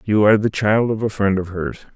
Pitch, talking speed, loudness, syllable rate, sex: 105 Hz, 275 wpm, -18 LUFS, 5.6 syllables/s, male